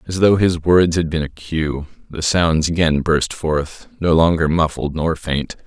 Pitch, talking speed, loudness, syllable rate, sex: 80 Hz, 180 wpm, -18 LUFS, 4.1 syllables/s, male